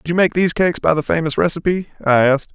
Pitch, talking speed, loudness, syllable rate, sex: 155 Hz, 260 wpm, -17 LUFS, 7.4 syllables/s, male